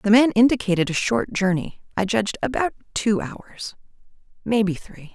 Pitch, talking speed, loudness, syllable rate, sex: 210 Hz, 150 wpm, -21 LUFS, 4.9 syllables/s, female